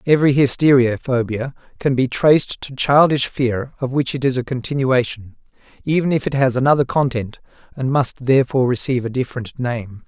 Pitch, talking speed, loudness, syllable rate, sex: 130 Hz, 165 wpm, -18 LUFS, 5.5 syllables/s, male